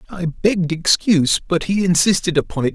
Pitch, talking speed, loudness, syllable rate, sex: 175 Hz, 175 wpm, -17 LUFS, 5.6 syllables/s, male